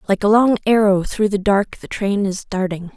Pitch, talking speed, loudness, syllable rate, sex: 200 Hz, 225 wpm, -18 LUFS, 4.9 syllables/s, female